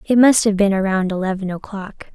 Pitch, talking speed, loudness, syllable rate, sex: 200 Hz, 195 wpm, -17 LUFS, 5.4 syllables/s, female